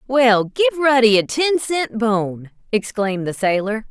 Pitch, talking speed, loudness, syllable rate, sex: 235 Hz, 155 wpm, -18 LUFS, 4.1 syllables/s, female